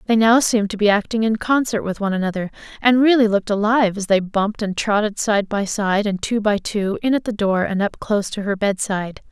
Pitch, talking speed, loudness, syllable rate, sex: 210 Hz, 240 wpm, -19 LUFS, 6.0 syllables/s, female